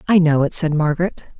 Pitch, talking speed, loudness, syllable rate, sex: 160 Hz, 215 wpm, -17 LUFS, 5.9 syllables/s, female